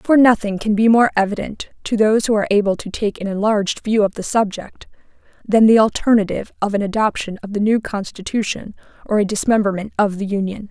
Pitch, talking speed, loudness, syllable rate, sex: 210 Hz, 195 wpm, -18 LUFS, 6.0 syllables/s, female